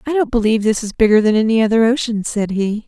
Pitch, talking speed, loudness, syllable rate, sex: 225 Hz, 250 wpm, -16 LUFS, 6.3 syllables/s, female